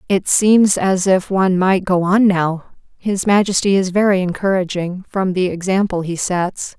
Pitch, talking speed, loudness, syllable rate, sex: 190 Hz, 170 wpm, -16 LUFS, 4.4 syllables/s, female